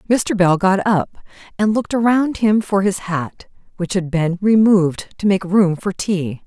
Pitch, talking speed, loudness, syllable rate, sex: 190 Hz, 185 wpm, -17 LUFS, 4.4 syllables/s, female